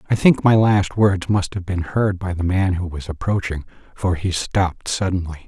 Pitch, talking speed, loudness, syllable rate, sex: 95 Hz, 210 wpm, -20 LUFS, 4.9 syllables/s, male